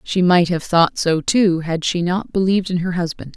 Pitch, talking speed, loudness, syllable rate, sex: 175 Hz, 230 wpm, -18 LUFS, 4.9 syllables/s, female